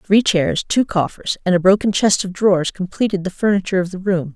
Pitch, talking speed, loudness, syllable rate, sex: 190 Hz, 220 wpm, -17 LUFS, 5.8 syllables/s, female